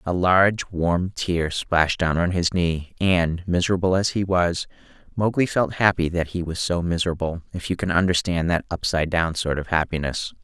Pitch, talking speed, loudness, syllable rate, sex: 85 Hz, 180 wpm, -22 LUFS, 5.0 syllables/s, male